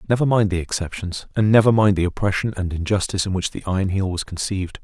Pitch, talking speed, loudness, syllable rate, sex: 95 Hz, 225 wpm, -21 LUFS, 6.7 syllables/s, male